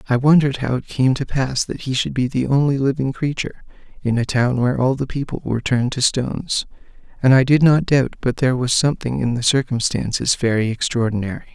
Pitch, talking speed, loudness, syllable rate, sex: 130 Hz, 210 wpm, -19 LUFS, 6.1 syllables/s, male